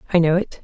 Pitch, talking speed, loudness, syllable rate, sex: 170 Hz, 280 wpm, -18 LUFS, 8.1 syllables/s, female